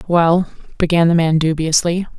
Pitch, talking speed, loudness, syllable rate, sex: 165 Hz, 135 wpm, -15 LUFS, 4.5 syllables/s, female